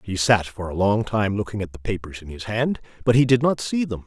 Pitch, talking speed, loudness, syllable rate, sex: 110 Hz, 280 wpm, -22 LUFS, 5.7 syllables/s, male